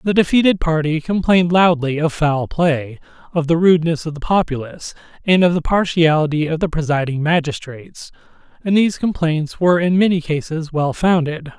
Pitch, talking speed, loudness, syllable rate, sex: 165 Hz, 160 wpm, -17 LUFS, 5.5 syllables/s, male